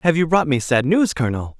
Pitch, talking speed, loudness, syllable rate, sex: 150 Hz, 265 wpm, -18 LUFS, 6.0 syllables/s, male